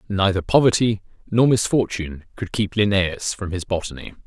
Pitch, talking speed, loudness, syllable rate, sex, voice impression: 100 Hz, 140 wpm, -20 LUFS, 5.3 syllables/s, male, masculine, adult-like, cool, sincere, slightly calm, slightly mature, slightly elegant